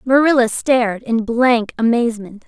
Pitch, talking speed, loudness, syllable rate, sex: 235 Hz, 120 wpm, -16 LUFS, 4.7 syllables/s, female